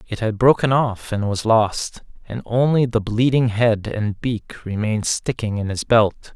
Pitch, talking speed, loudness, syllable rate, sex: 110 Hz, 180 wpm, -20 LUFS, 4.2 syllables/s, male